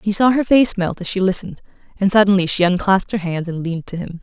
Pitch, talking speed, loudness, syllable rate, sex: 190 Hz, 255 wpm, -17 LUFS, 6.6 syllables/s, female